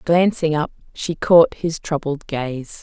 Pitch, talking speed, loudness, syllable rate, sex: 155 Hz, 150 wpm, -19 LUFS, 3.6 syllables/s, female